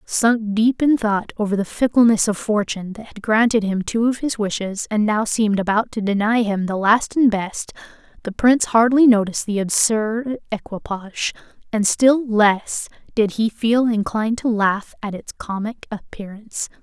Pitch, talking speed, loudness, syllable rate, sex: 220 Hz, 170 wpm, -19 LUFS, 4.8 syllables/s, female